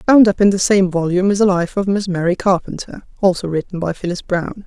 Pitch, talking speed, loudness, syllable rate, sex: 185 Hz, 230 wpm, -16 LUFS, 6.2 syllables/s, female